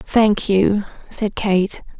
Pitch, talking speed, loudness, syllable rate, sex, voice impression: 200 Hz, 120 wpm, -18 LUFS, 2.7 syllables/s, female, feminine, adult-like, relaxed, slightly weak, soft, raspy, calm, friendly, reassuring, elegant, slightly lively, slightly modest